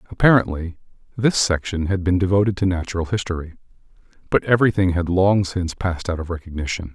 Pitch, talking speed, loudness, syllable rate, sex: 90 Hz, 155 wpm, -20 LUFS, 6.4 syllables/s, male